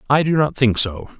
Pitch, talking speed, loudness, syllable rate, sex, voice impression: 130 Hz, 250 wpm, -17 LUFS, 5.4 syllables/s, male, very masculine, very adult-like, slightly old, very thick, tensed, powerful, bright, slightly soft, muffled, slightly fluent, slightly raspy, cool, very intellectual, very sincere, very calm, very mature, friendly, reassuring, slightly unique, slightly elegant, wild, sweet, slightly lively, very kind, modest